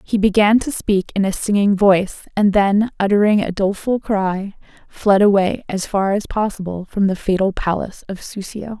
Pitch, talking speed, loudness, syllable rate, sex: 200 Hz, 175 wpm, -18 LUFS, 4.9 syllables/s, female